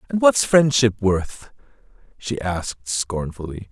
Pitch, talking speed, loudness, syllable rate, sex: 115 Hz, 115 wpm, -20 LUFS, 3.9 syllables/s, male